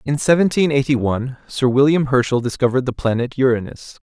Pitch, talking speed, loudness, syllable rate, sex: 130 Hz, 160 wpm, -18 LUFS, 6.1 syllables/s, male